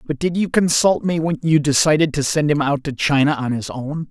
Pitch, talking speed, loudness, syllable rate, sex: 150 Hz, 250 wpm, -18 LUFS, 5.3 syllables/s, male